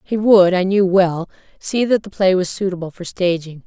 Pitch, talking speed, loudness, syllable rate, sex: 185 Hz, 215 wpm, -17 LUFS, 4.9 syllables/s, female